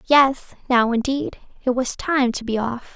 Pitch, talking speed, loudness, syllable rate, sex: 250 Hz, 185 wpm, -21 LUFS, 4.3 syllables/s, female